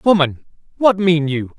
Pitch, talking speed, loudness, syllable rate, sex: 170 Hz, 150 wpm, -16 LUFS, 4.1 syllables/s, male